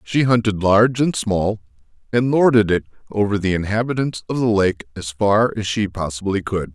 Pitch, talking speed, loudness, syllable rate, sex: 105 Hz, 180 wpm, -19 LUFS, 5.1 syllables/s, male